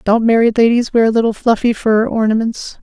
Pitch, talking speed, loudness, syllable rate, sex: 225 Hz, 170 wpm, -14 LUFS, 5.2 syllables/s, female